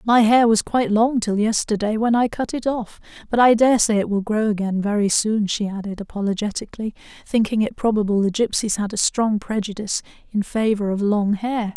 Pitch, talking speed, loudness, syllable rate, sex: 215 Hz, 200 wpm, -20 LUFS, 5.5 syllables/s, female